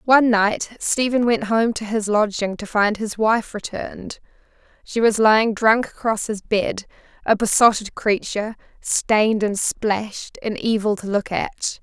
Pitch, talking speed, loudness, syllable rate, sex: 215 Hz, 155 wpm, -20 LUFS, 4.4 syllables/s, female